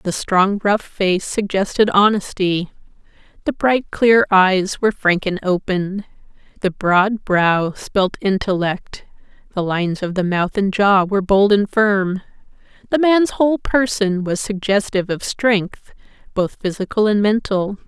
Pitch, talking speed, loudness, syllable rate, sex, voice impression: 200 Hz, 140 wpm, -17 LUFS, 4.1 syllables/s, female, feminine, adult-like, clear, slightly intellectual, slightly calm, elegant